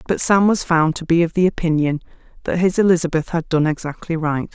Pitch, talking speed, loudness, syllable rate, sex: 165 Hz, 210 wpm, -18 LUFS, 5.9 syllables/s, female